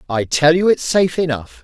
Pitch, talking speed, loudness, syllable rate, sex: 155 Hz, 220 wpm, -16 LUFS, 5.5 syllables/s, male